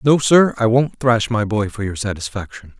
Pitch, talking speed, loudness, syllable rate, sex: 115 Hz, 215 wpm, -17 LUFS, 4.9 syllables/s, male